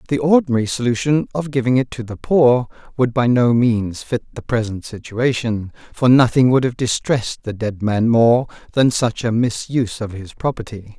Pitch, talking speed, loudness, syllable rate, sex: 120 Hz, 180 wpm, -18 LUFS, 5.0 syllables/s, male